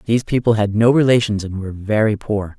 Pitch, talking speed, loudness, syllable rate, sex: 110 Hz, 210 wpm, -17 LUFS, 6.2 syllables/s, female